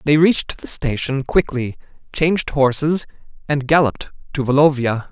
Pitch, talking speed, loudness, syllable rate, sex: 140 Hz, 130 wpm, -18 LUFS, 5.0 syllables/s, male